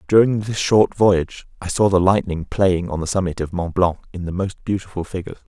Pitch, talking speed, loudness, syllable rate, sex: 95 Hz, 215 wpm, -19 LUFS, 5.7 syllables/s, male